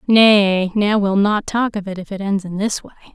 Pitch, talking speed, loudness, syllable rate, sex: 200 Hz, 250 wpm, -17 LUFS, 4.7 syllables/s, female